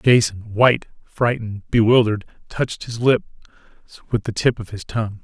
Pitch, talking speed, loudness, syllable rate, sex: 110 Hz, 150 wpm, -20 LUFS, 5.8 syllables/s, male